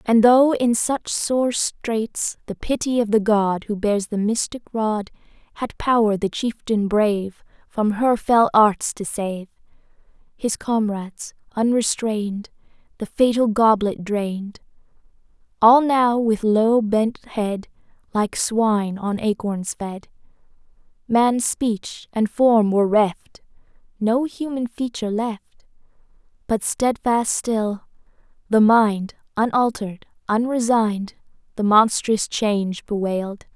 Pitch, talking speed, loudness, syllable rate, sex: 220 Hz, 120 wpm, -20 LUFS, 3.7 syllables/s, female